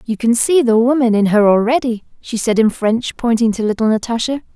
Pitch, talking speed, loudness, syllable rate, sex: 230 Hz, 210 wpm, -15 LUFS, 5.5 syllables/s, female